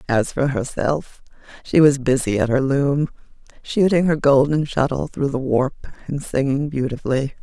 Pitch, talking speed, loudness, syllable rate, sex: 140 Hz, 155 wpm, -20 LUFS, 4.7 syllables/s, female